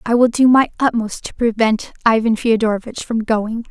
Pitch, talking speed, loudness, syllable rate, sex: 230 Hz, 180 wpm, -17 LUFS, 5.0 syllables/s, female